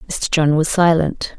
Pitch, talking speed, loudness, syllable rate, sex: 160 Hz, 175 wpm, -16 LUFS, 4.1 syllables/s, female